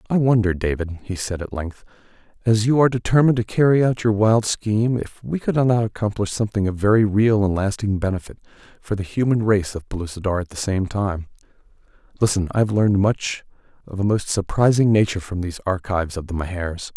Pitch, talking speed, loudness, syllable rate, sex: 105 Hz, 195 wpm, -20 LUFS, 6.0 syllables/s, male